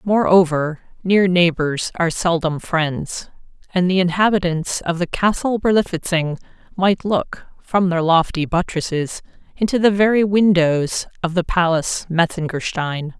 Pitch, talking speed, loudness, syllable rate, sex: 175 Hz, 125 wpm, -18 LUFS, 4.4 syllables/s, female